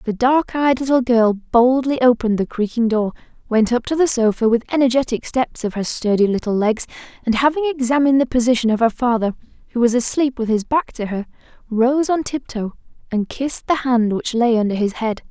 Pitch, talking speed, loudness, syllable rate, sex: 240 Hz, 200 wpm, -18 LUFS, 5.5 syllables/s, female